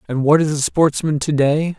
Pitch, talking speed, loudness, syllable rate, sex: 150 Hz, 235 wpm, -17 LUFS, 4.7 syllables/s, male